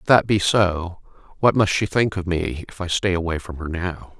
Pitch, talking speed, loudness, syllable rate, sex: 90 Hz, 245 wpm, -21 LUFS, 4.9 syllables/s, male